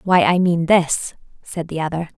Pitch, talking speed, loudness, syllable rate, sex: 170 Hz, 190 wpm, -18 LUFS, 4.5 syllables/s, female